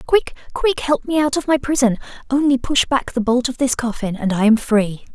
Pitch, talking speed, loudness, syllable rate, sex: 255 Hz, 235 wpm, -18 LUFS, 5.2 syllables/s, female